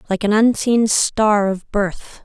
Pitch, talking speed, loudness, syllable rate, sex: 210 Hz, 160 wpm, -17 LUFS, 3.5 syllables/s, female